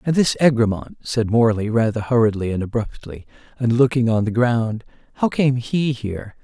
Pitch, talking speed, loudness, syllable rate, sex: 120 Hz, 170 wpm, -19 LUFS, 5.1 syllables/s, male